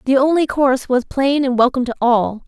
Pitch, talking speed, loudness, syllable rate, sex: 260 Hz, 220 wpm, -16 LUFS, 5.8 syllables/s, female